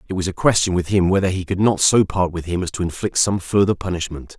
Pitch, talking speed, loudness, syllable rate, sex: 90 Hz, 275 wpm, -19 LUFS, 6.2 syllables/s, male